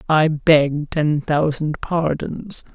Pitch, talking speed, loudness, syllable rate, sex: 155 Hz, 110 wpm, -19 LUFS, 2.8 syllables/s, female